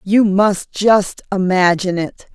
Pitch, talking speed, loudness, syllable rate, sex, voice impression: 195 Hz, 130 wpm, -15 LUFS, 3.8 syllables/s, female, slightly feminine, very adult-like, clear, slightly sincere, slightly unique